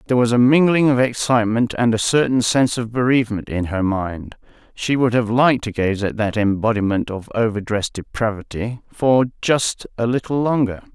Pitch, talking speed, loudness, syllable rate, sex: 115 Hz, 175 wpm, -19 LUFS, 5.4 syllables/s, male